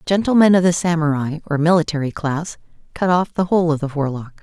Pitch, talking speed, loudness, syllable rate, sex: 165 Hz, 190 wpm, -18 LUFS, 6.2 syllables/s, female